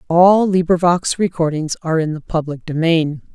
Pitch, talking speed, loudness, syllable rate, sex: 165 Hz, 145 wpm, -17 LUFS, 5.0 syllables/s, female